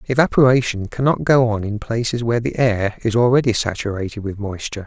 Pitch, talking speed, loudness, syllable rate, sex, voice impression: 115 Hz, 175 wpm, -18 LUFS, 5.9 syllables/s, male, masculine, adult-like, slightly fluent, refreshing, slightly sincere, friendly, slightly kind